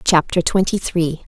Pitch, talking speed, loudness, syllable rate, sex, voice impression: 170 Hz, 135 wpm, -18 LUFS, 4.2 syllables/s, female, very feminine, slightly adult-like, very thin, tensed, slightly powerful, slightly bright, very hard, very clear, very fluent, very cute, intellectual, very refreshing, slightly sincere, slightly calm, very friendly, slightly reassuring, unique, elegant, slightly wild, very sweet, lively